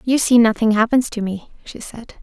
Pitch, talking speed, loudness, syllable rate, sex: 225 Hz, 215 wpm, -16 LUFS, 5.1 syllables/s, female